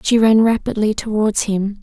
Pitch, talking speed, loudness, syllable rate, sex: 215 Hz, 165 wpm, -16 LUFS, 4.7 syllables/s, female